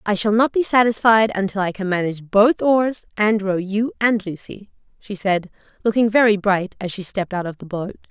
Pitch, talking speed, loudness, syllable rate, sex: 205 Hz, 205 wpm, -19 LUFS, 5.2 syllables/s, female